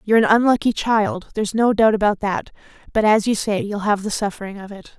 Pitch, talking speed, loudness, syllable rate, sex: 210 Hz, 230 wpm, -19 LUFS, 6.0 syllables/s, female